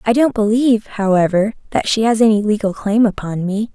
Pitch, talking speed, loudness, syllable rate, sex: 215 Hz, 190 wpm, -16 LUFS, 5.6 syllables/s, female